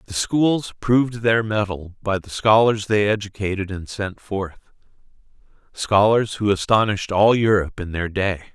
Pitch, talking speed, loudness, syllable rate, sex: 100 Hz, 150 wpm, -20 LUFS, 4.6 syllables/s, male